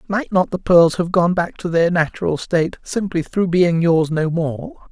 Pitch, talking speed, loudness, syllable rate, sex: 170 Hz, 205 wpm, -18 LUFS, 4.5 syllables/s, male